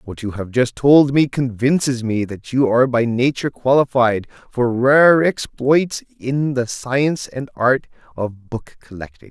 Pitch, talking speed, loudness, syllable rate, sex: 125 Hz, 160 wpm, -17 LUFS, 4.2 syllables/s, male